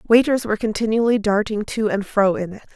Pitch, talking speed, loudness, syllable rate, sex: 215 Hz, 195 wpm, -20 LUFS, 6.1 syllables/s, female